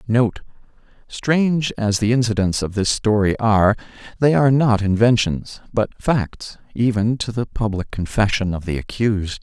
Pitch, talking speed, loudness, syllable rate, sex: 110 Hz, 140 wpm, -19 LUFS, 4.9 syllables/s, male